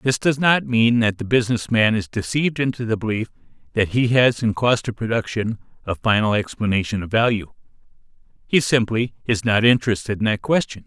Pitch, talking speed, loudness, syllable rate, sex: 115 Hz, 180 wpm, -20 LUFS, 5.6 syllables/s, male